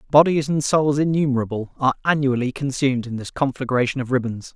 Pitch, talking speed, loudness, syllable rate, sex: 135 Hz, 160 wpm, -21 LUFS, 6.3 syllables/s, male